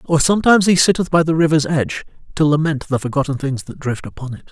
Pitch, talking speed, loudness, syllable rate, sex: 155 Hz, 225 wpm, -17 LUFS, 6.6 syllables/s, male